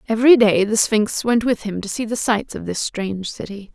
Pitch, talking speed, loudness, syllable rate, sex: 215 Hz, 240 wpm, -19 LUFS, 5.3 syllables/s, female